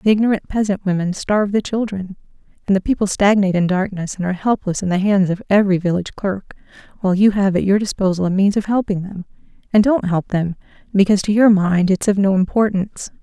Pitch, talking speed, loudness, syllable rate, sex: 195 Hz, 210 wpm, -17 LUFS, 6.4 syllables/s, female